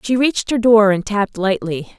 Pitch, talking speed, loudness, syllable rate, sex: 215 Hz, 210 wpm, -16 LUFS, 5.4 syllables/s, female